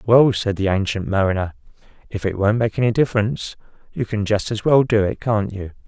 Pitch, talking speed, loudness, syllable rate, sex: 105 Hz, 205 wpm, -20 LUFS, 5.7 syllables/s, male